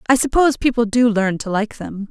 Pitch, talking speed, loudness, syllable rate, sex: 225 Hz, 230 wpm, -17 LUFS, 5.7 syllables/s, female